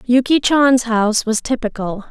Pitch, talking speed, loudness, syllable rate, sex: 240 Hz, 140 wpm, -16 LUFS, 4.6 syllables/s, female